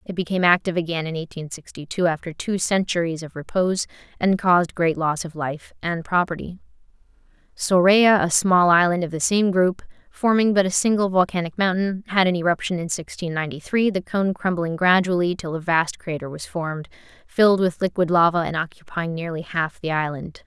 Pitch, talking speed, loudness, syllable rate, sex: 175 Hz, 180 wpm, -21 LUFS, 5.5 syllables/s, female